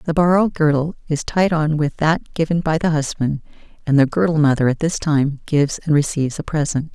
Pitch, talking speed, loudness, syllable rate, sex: 155 Hz, 205 wpm, -18 LUFS, 5.7 syllables/s, female